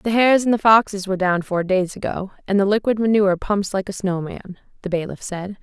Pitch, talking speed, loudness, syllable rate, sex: 195 Hz, 225 wpm, -19 LUFS, 5.6 syllables/s, female